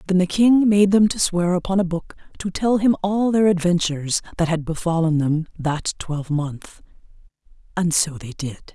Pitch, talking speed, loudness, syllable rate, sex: 175 Hz, 180 wpm, -20 LUFS, 4.9 syllables/s, female